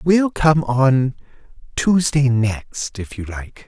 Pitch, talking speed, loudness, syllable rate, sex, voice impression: 135 Hz, 115 wpm, -18 LUFS, 3.0 syllables/s, male, very masculine, adult-like, slightly thick, slightly muffled, slightly unique, slightly wild